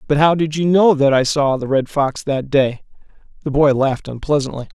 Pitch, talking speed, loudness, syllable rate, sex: 145 Hz, 215 wpm, -17 LUFS, 5.3 syllables/s, male